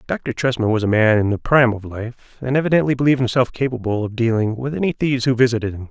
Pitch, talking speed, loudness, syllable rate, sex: 120 Hz, 235 wpm, -18 LUFS, 6.6 syllables/s, male